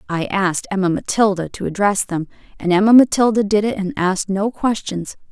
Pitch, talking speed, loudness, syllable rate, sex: 200 Hz, 180 wpm, -18 LUFS, 5.6 syllables/s, female